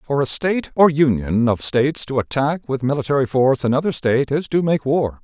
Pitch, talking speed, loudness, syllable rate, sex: 135 Hz, 205 wpm, -19 LUFS, 5.7 syllables/s, male